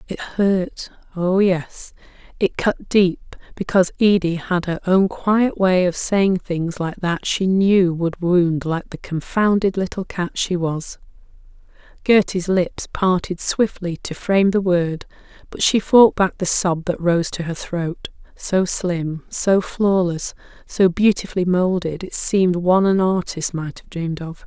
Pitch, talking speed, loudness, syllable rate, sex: 180 Hz, 155 wpm, -19 LUFS, 4.0 syllables/s, female